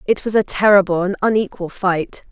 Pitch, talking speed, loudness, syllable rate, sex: 195 Hz, 180 wpm, -17 LUFS, 5.4 syllables/s, female